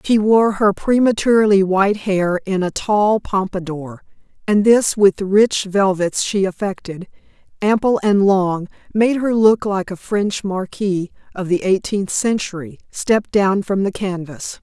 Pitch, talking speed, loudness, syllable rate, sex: 200 Hz, 150 wpm, -17 LUFS, 4.3 syllables/s, female